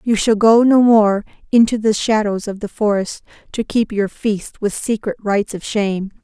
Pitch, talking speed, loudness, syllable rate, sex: 210 Hz, 190 wpm, -17 LUFS, 4.8 syllables/s, female